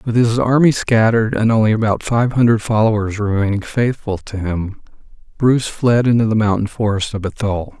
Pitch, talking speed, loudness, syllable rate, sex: 110 Hz, 170 wpm, -16 LUFS, 5.5 syllables/s, male